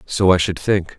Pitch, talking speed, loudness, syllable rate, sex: 90 Hz, 245 wpm, -17 LUFS, 4.6 syllables/s, male